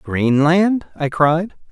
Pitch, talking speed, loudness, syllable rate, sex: 160 Hz, 105 wpm, -17 LUFS, 2.8 syllables/s, male